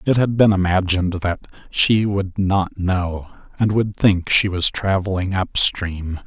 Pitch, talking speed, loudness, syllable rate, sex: 95 Hz, 155 wpm, -18 LUFS, 3.9 syllables/s, male